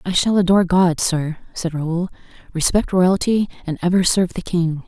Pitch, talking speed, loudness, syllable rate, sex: 175 Hz, 170 wpm, -18 LUFS, 5.0 syllables/s, female